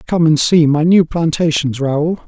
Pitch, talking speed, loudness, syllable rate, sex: 160 Hz, 185 wpm, -14 LUFS, 4.3 syllables/s, male